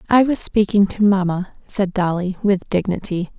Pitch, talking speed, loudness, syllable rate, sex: 195 Hz, 160 wpm, -19 LUFS, 4.7 syllables/s, female